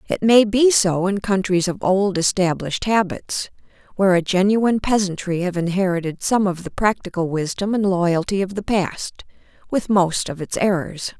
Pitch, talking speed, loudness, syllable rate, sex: 190 Hz, 165 wpm, -19 LUFS, 4.9 syllables/s, female